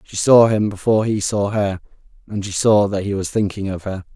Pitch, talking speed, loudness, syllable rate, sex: 100 Hz, 230 wpm, -18 LUFS, 5.4 syllables/s, male